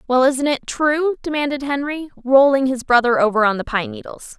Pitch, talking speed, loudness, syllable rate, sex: 265 Hz, 190 wpm, -18 LUFS, 5.1 syllables/s, female